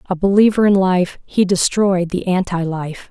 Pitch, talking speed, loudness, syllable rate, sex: 185 Hz, 175 wpm, -16 LUFS, 4.4 syllables/s, female